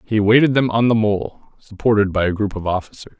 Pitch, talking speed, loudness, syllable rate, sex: 105 Hz, 225 wpm, -17 LUFS, 6.2 syllables/s, male